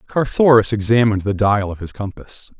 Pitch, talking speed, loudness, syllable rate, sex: 110 Hz, 160 wpm, -16 LUFS, 5.4 syllables/s, male